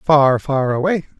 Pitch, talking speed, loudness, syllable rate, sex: 145 Hz, 150 wpm, -17 LUFS, 3.9 syllables/s, male